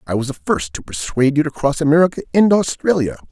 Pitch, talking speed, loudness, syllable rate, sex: 140 Hz, 215 wpm, -17 LUFS, 6.4 syllables/s, male